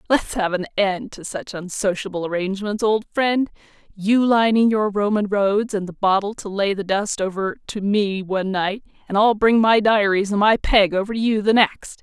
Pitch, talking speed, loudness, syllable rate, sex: 205 Hz, 200 wpm, -20 LUFS, 4.8 syllables/s, female